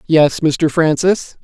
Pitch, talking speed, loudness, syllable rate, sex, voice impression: 160 Hz, 125 wpm, -14 LUFS, 3.2 syllables/s, male, very masculine, very adult-like, slightly old, very thick, slightly tensed, very powerful, bright, soft, very clear, very fluent, slightly raspy, very cool, intellectual, slightly refreshing, sincere, very calm, very mature, very friendly, very reassuring, very unique, very elegant, wild, very sweet, lively, very kind, slightly intense, slightly modest